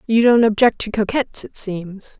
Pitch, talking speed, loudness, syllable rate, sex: 215 Hz, 190 wpm, -18 LUFS, 4.9 syllables/s, female